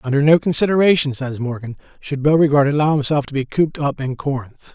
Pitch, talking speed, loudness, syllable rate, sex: 145 Hz, 190 wpm, -18 LUFS, 6.4 syllables/s, male